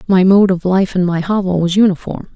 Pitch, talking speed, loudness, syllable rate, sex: 185 Hz, 230 wpm, -14 LUFS, 5.6 syllables/s, female